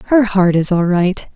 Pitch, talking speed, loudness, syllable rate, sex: 190 Hz, 220 wpm, -14 LUFS, 3.9 syllables/s, female